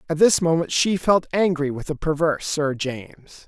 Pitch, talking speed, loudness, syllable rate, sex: 160 Hz, 190 wpm, -21 LUFS, 4.9 syllables/s, male